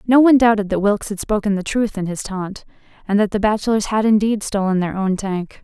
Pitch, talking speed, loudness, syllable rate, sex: 205 Hz, 235 wpm, -18 LUFS, 5.9 syllables/s, female